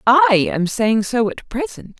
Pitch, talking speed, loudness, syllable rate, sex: 245 Hz, 180 wpm, -18 LUFS, 3.8 syllables/s, female